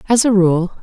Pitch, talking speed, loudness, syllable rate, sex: 195 Hz, 220 wpm, -14 LUFS, 5.3 syllables/s, female